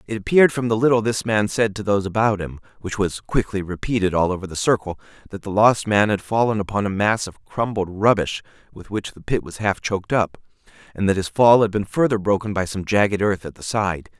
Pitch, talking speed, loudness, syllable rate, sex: 100 Hz, 230 wpm, -20 LUFS, 5.8 syllables/s, male